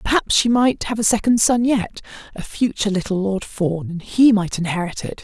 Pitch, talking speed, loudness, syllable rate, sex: 210 Hz, 195 wpm, -18 LUFS, 5.2 syllables/s, female